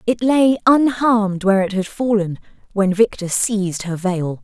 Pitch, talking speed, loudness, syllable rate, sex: 205 Hz, 160 wpm, -17 LUFS, 4.7 syllables/s, female